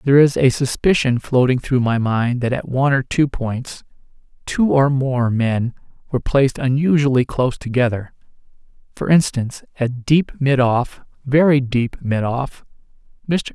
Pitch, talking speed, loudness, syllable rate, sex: 130 Hz, 135 wpm, -18 LUFS, 4.7 syllables/s, male